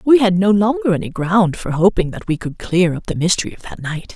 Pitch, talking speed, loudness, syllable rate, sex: 190 Hz, 260 wpm, -17 LUFS, 5.7 syllables/s, female